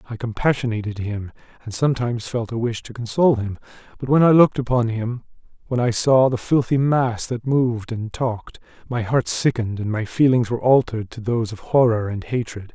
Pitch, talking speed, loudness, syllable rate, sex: 120 Hz, 195 wpm, -20 LUFS, 5.8 syllables/s, male